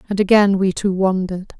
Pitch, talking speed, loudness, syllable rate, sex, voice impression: 190 Hz, 190 wpm, -17 LUFS, 5.8 syllables/s, female, very feminine, very adult-like, middle-aged, slightly thin, slightly tensed, slightly powerful, slightly dark, slightly soft, slightly clear, fluent, slightly cute, intellectual, very refreshing, sincere, calm, friendly, very reassuring, slightly unique, elegant, slightly wild, sweet, lively, kind, slightly modest